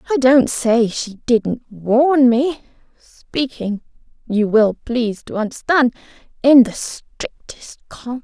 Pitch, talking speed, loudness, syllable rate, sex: 245 Hz, 115 wpm, -17 LUFS, 3.9 syllables/s, female